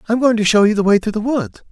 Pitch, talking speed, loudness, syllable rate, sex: 210 Hz, 350 wpm, -15 LUFS, 6.7 syllables/s, male